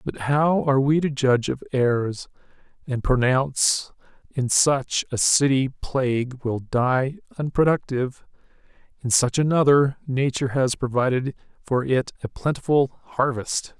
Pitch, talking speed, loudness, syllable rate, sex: 135 Hz, 120 wpm, -22 LUFS, 4.3 syllables/s, male